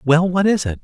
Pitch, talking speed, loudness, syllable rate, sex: 165 Hz, 285 wpm, -17 LUFS, 5.1 syllables/s, male